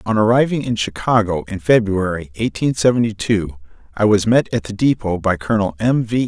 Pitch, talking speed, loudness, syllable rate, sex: 105 Hz, 180 wpm, -17 LUFS, 5.4 syllables/s, male